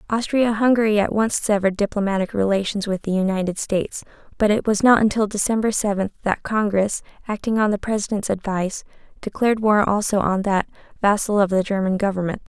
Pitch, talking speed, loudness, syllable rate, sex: 205 Hz, 165 wpm, -20 LUFS, 6.0 syllables/s, female